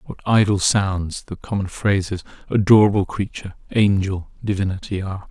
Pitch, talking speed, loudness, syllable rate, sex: 100 Hz, 125 wpm, -20 LUFS, 5.2 syllables/s, male